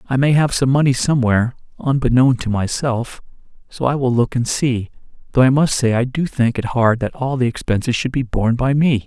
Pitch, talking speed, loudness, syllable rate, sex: 125 Hz, 220 wpm, -17 LUFS, 5.5 syllables/s, male